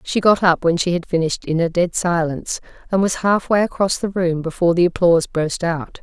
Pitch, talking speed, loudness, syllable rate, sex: 175 Hz, 220 wpm, -18 LUFS, 5.7 syllables/s, female